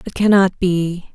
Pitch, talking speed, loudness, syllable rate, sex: 185 Hz, 155 wpm, -16 LUFS, 3.9 syllables/s, female